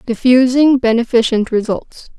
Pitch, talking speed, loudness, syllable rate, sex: 240 Hz, 80 wpm, -13 LUFS, 4.5 syllables/s, female